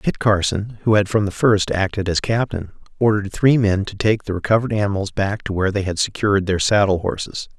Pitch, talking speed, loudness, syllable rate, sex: 100 Hz, 215 wpm, -19 LUFS, 5.9 syllables/s, male